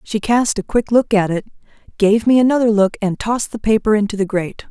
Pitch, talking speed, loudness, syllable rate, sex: 215 Hz, 230 wpm, -16 LUFS, 5.9 syllables/s, female